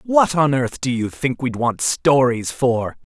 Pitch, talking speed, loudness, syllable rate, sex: 130 Hz, 190 wpm, -19 LUFS, 3.8 syllables/s, male